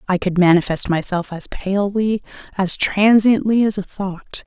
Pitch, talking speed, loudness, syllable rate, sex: 195 Hz, 150 wpm, -18 LUFS, 4.6 syllables/s, female